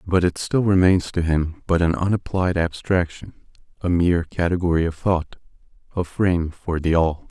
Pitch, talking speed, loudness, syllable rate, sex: 85 Hz, 165 wpm, -21 LUFS, 4.9 syllables/s, male